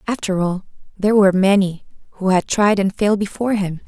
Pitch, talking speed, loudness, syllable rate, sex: 195 Hz, 185 wpm, -17 LUFS, 6.3 syllables/s, female